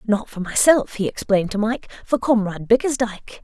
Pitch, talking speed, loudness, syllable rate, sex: 215 Hz, 175 wpm, -20 LUFS, 5.8 syllables/s, female